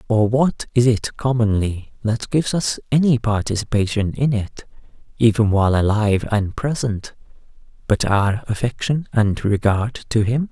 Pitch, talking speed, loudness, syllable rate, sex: 115 Hz, 135 wpm, -19 LUFS, 4.6 syllables/s, male